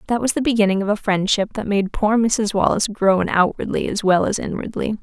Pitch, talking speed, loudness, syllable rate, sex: 210 Hz, 215 wpm, -19 LUFS, 5.6 syllables/s, female